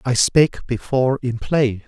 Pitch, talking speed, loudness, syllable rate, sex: 125 Hz, 160 wpm, -19 LUFS, 4.6 syllables/s, male